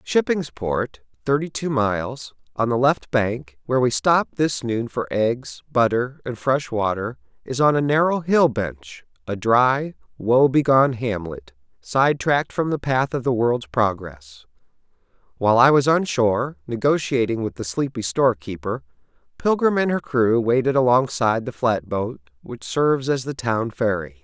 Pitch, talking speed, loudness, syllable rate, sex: 120 Hz, 155 wpm, -21 LUFS, 4.4 syllables/s, male